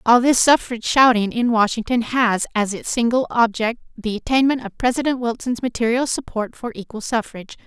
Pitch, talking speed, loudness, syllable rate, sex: 235 Hz, 165 wpm, -19 LUFS, 5.5 syllables/s, female